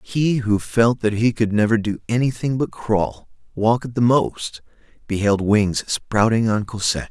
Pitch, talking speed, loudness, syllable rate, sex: 110 Hz, 170 wpm, -20 LUFS, 4.3 syllables/s, male